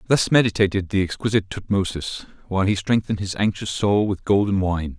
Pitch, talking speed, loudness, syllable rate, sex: 100 Hz, 170 wpm, -21 LUFS, 5.9 syllables/s, male